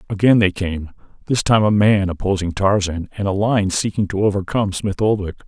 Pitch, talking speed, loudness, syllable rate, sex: 100 Hz, 185 wpm, -18 LUFS, 5.5 syllables/s, male